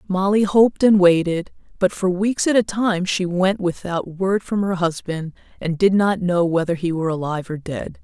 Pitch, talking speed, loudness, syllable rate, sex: 185 Hz, 200 wpm, -19 LUFS, 4.9 syllables/s, female